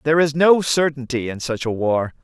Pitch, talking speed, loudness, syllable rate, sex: 140 Hz, 215 wpm, -19 LUFS, 5.4 syllables/s, male